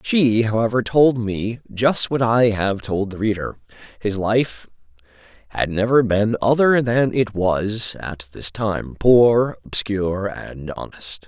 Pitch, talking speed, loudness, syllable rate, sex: 110 Hz, 145 wpm, -19 LUFS, 3.7 syllables/s, male